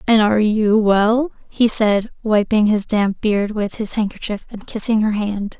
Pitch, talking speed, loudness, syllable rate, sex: 215 Hz, 180 wpm, -17 LUFS, 4.3 syllables/s, female